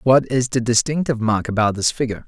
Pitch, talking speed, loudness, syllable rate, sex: 120 Hz, 210 wpm, -19 LUFS, 6.5 syllables/s, male